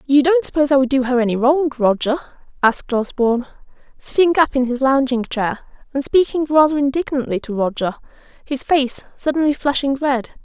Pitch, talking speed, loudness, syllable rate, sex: 270 Hz, 165 wpm, -18 LUFS, 5.5 syllables/s, female